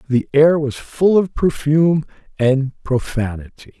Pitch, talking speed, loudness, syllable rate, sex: 140 Hz, 125 wpm, -17 LUFS, 4.0 syllables/s, male